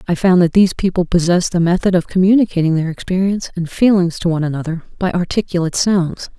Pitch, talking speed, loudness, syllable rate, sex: 180 Hz, 190 wpm, -16 LUFS, 6.7 syllables/s, female